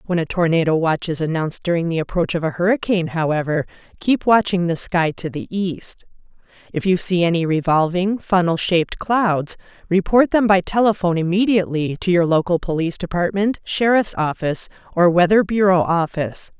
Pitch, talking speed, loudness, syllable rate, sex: 175 Hz, 160 wpm, -19 LUFS, 4.2 syllables/s, female